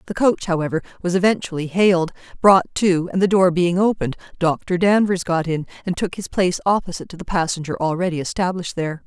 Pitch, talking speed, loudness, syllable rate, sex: 175 Hz, 185 wpm, -19 LUFS, 6.2 syllables/s, female